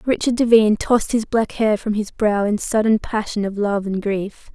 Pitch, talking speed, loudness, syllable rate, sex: 215 Hz, 210 wpm, -19 LUFS, 5.0 syllables/s, female